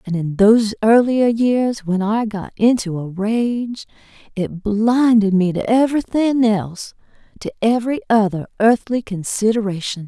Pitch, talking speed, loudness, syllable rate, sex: 215 Hz, 130 wpm, -17 LUFS, 4.4 syllables/s, female